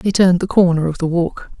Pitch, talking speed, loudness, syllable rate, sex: 175 Hz, 265 wpm, -16 LUFS, 6.0 syllables/s, female